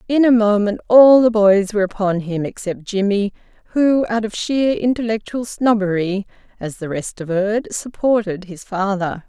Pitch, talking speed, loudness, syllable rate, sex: 210 Hz, 155 wpm, -17 LUFS, 4.8 syllables/s, female